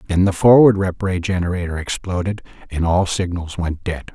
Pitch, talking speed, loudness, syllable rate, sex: 90 Hz, 175 wpm, -18 LUFS, 5.2 syllables/s, male